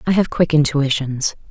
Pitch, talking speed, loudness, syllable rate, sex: 150 Hz, 160 wpm, -17 LUFS, 4.7 syllables/s, female